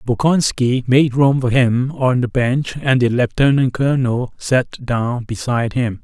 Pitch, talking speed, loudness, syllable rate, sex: 125 Hz, 160 wpm, -17 LUFS, 4.1 syllables/s, male